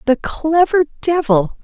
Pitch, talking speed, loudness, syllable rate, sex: 290 Hz, 110 wpm, -16 LUFS, 3.9 syllables/s, female